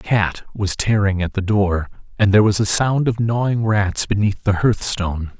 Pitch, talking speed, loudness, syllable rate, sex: 100 Hz, 210 wpm, -18 LUFS, 4.9 syllables/s, male